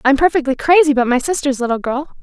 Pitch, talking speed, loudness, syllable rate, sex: 280 Hz, 215 wpm, -15 LUFS, 6.7 syllables/s, female